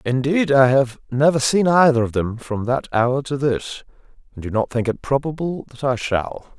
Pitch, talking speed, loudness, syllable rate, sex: 135 Hz, 200 wpm, -19 LUFS, 4.7 syllables/s, male